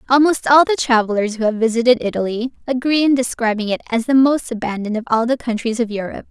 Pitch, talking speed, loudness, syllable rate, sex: 240 Hz, 210 wpm, -17 LUFS, 6.7 syllables/s, female